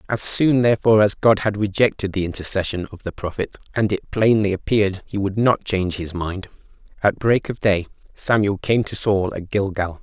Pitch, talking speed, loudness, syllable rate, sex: 100 Hz, 190 wpm, -20 LUFS, 5.3 syllables/s, male